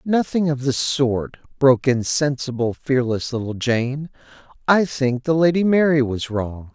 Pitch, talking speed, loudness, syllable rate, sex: 135 Hz, 150 wpm, -20 LUFS, 4.3 syllables/s, male